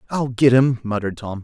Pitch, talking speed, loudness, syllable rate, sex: 120 Hz, 210 wpm, -18 LUFS, 5.8 syllables/s, male